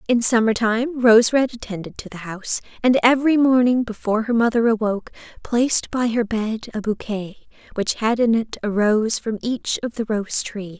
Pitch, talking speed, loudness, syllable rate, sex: 225 Hz, 190 wpm, -20 LUFS, 5.1 syllables/s, female